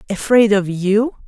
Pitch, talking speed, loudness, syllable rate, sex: 210 Hz, 140 wpm, -15 LUFS, 4.2 syllables/s, female